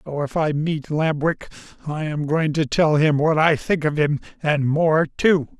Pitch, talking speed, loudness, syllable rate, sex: 155 Hz, 205 wpm, -20 LUFS, 4.2 syllables/s, male